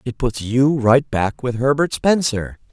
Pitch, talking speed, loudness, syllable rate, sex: 130 Hz, 175 wpm, -18 LUFS, 4.0 syllables/s, male